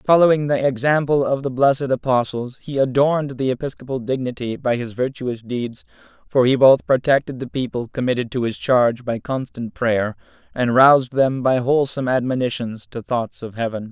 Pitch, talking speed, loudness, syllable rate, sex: 130 Hz, 170 wpm, -19 LUFS, 5.4 syllables/s, male